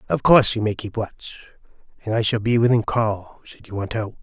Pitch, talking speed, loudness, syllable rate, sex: 110 Hz, 225 wpm, -20 LUFS, 5.3 syllables/s, male